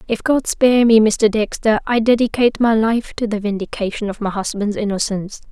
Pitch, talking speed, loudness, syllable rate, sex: 215 Hz, 185 wpm, -17 LUFS, 5.6 syllables/s, female